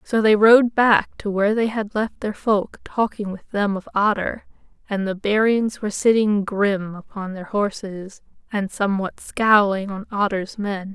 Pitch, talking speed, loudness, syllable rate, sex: 205 Hz, 170 wpm, -20 LUFS, 4.3 syllables/s, female